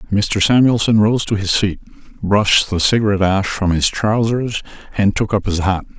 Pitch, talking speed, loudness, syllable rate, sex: 100 Hz, 180 wpm, -16 LUFS, 5.1 syllables/s, male